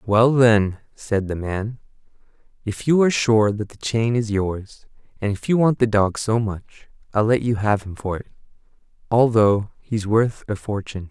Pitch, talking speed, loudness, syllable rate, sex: 110 Hz, 185 wpm, -20 LUFS, 4.4 syllables/s, male